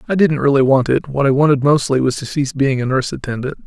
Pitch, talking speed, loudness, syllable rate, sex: 135 Hz, 260 wpm, -16 LUFS, 6.6 syllables/s, male